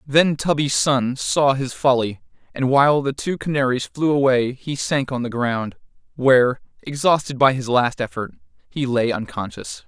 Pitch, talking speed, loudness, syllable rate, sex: 130 Hz, 165 wpm, -20 LUFS, 4.6 syllables/s, male